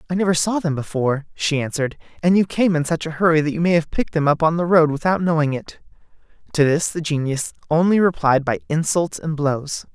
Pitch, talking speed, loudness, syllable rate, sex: 160 Hz, 225 wpm, -19 LUFS, 5.9 syllables/s, male